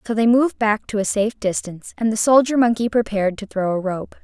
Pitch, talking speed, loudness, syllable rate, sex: 215 Hz, 240 wpm, -19 LUFS, 6.2 syllables/s, female